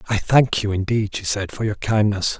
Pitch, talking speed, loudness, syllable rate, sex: 105 Hz, 225 wpm, -20 LUFS, 5.0 syllables/s, male